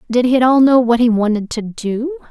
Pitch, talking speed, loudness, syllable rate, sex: 245 Hz, 260 wpm, -14 LUFS, 5.5 syllables/s, female